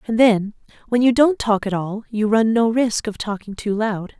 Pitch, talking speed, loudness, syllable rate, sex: 220 Hz, 230 wpm, -19 LUFS, 4.7 syllables/s, female